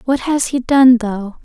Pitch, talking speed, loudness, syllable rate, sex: 250 Hz, 210 wpm, -14 LUFS, 3.9 syllables/s, female